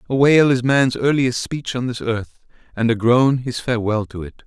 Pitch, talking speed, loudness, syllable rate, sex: 120 Hz, 215 wpm, -18 LUFS, 5.0 syllables/s, male